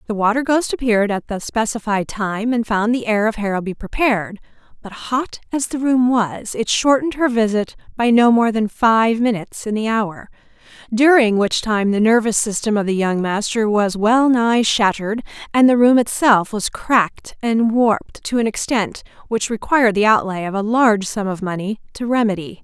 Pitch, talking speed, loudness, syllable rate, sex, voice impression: 220 Hz, 190 wpm, -17 LUFS, 5.0 syllables/s, female, very feminine, adult-like, slightly middle-aged, thin, tensed, slightly powerful, bright, slightly hard, clear, very fluent, slightly cute, cool, intellectual, very refreshing, sincere, slightly calm, slightly friendly, slightly reassuring, unique, slightly elegant, sweet, very lively, strict, intense, sharp, slightly light